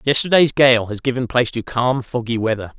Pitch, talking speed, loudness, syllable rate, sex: 125 Hz, 195 wpm, -17 LUFS, 5.6 syllables/s, male